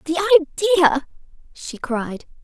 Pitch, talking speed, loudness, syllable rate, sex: 295 Hz, 100 wpm, -18 LUFS, 4.8 syllables/s, female